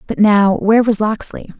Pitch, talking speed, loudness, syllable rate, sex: 210 Hz, 190 wpm, -14 LUFS, 5.1 syllables/s, female